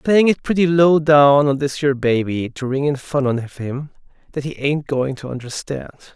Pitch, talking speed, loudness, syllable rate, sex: 140 Hz, 215 wpm, -18 LUFS, 5.4 syllables/s, male